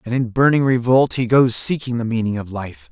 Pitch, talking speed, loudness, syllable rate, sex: 120 Hz, 225 wpm, -17 LUFS, 5.3 syllables/s, male